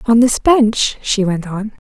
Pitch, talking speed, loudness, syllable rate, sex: 220 Hz, 195 wpm, -15 LUFS, 3.8 syllables/s, female